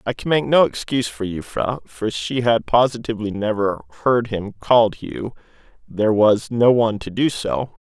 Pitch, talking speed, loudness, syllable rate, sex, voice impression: 110 Hz, 175 wpm, -19 LUFS, 5.0 syllables/s, male, very masculine, very adult-like, cool, calm, elegant